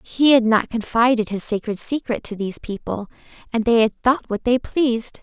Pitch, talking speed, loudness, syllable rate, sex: 230 Hz, 195 wpm, -20 LUFS, 5.1 syllables/s, female